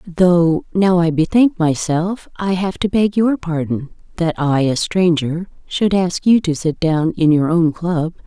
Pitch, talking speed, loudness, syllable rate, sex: 170 Hz, 175 wpm, -17 LUFS, 3.9 syllables/s, female